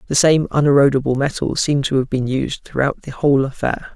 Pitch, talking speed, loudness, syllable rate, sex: 140 Hz, 195 wpm, -17 LUFS, 5.9 syllables/s, male